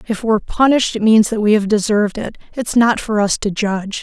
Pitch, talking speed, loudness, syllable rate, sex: 215 Hz, 240 wpm, -15 LUFS, 5.9 syllables/s, female